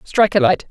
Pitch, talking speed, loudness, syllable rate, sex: 185 Hz, 255 wpm, -15 LUFS, 6.6 syllables/s, female